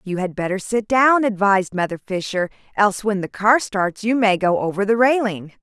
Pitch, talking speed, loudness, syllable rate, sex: 205 Hz, 205 wpm, -19 LUFS, 5.2 syllables/s, female